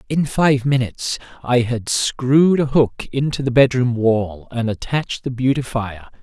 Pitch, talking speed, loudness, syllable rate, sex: 125 Hz, 155 wpm, -18 LUFS, 4.4 syllables/s, male